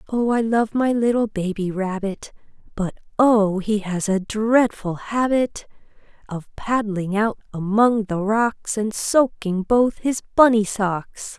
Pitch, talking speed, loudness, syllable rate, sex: 215 Hz, 130 wpm, -21 LUFS, 3.5 syllables/s, female